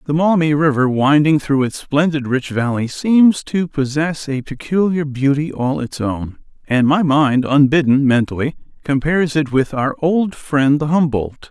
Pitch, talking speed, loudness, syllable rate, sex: 145 Hz, 160 wpm, -16 LUFS, 4.4 syllables/s, male